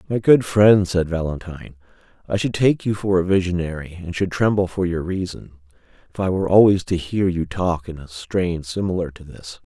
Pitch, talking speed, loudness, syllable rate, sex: 90 Hz, 200 wpm, -20 LUFS, 5.3 syllables/s, male